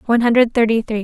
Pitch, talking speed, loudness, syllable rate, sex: 230 Hz, 230 wpm, -15 LUFS, 7.6 syllables/s, female